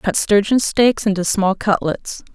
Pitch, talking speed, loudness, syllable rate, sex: 205 Hz, 155 wpm, -17 LUFS, 4.1 syllables/s, female